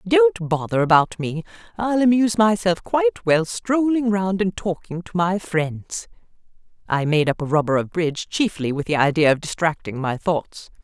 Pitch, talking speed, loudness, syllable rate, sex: 180 Hz, 170 wpm, -20 LUFS, 4.8 syllables/s, female